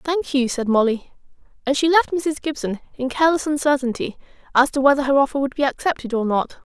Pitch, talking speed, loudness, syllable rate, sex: 280 Hz, 195 wpm, -20 LUFS, 6.0 syllables/s, female